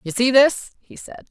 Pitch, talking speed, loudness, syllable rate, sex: 240 Hz, 230 wpm, -16 LUFS, 5.1 syllables/s, female